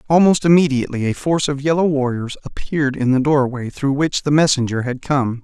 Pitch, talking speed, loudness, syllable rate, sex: 140 Hz, 190 wpm, -17 LUFS, 5.8 syllables/s, male